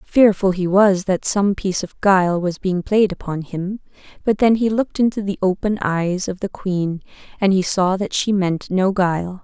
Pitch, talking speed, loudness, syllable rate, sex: 190 Hz, 205 wpm, -19 LUFS, 4.7 syllables/s, female